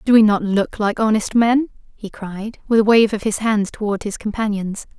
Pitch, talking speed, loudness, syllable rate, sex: 215 Hz, 215 wpm, -18 LUFS, 5.0 syllables/s, female